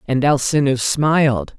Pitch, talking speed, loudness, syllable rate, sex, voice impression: 140 Hz, 115 wpm, -17 LUFS, 4.2 syllables/s, female, feminine, adult-like, tensed, slightly hard, intellectual, calm, reassuring, elegant, slightly lively, slightly sharp